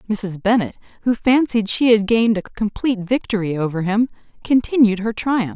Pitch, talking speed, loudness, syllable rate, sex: 215 Hz, 160 wpm, -18 LUFS, 5.4 syllables/s, female